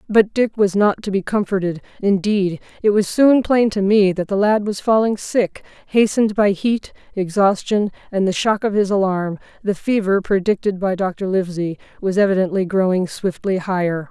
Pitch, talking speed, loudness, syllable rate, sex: 195 Hz, 175 wpm, -18 LUFS, 4.9 syllables/s, female